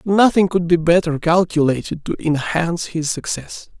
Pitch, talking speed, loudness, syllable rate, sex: 170 Hz, 140 wpm, -18 LUFS, 4.7 syllables/s, male